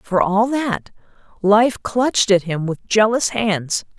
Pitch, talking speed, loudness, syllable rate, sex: 210 Hz, 150 wpm, -18 LUFS, 3.6 syllables/s, female